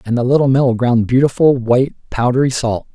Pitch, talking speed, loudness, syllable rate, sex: 125 Hz, 185 wpm, -14 LUFS, 5.7 syllables/s, male